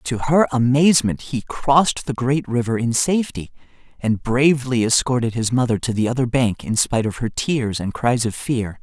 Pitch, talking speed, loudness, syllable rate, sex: 120 Hz, 190 wpm, -19 LUFS, 5.2 syllables/s, male